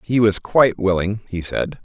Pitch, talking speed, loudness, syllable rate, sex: 100 Hz, 195 wpm, -19 LUFS, 4.8 syllables/s, male